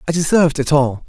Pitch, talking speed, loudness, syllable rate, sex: 150 Hz, 220 wpm, -15 LUFS, 6.7 syllables/s, male